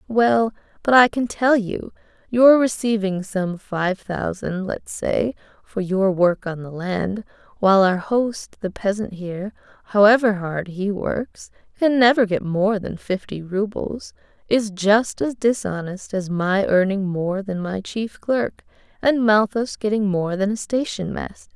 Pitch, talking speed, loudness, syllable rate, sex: 205 Hz, 155 wpm, -21 LUFS, 4.0 syllables/s, female